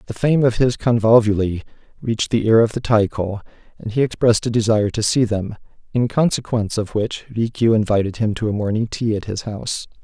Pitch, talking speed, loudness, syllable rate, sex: 110 Hz, 195 wpm, -19 LUFS, 5.9 syllables/s, male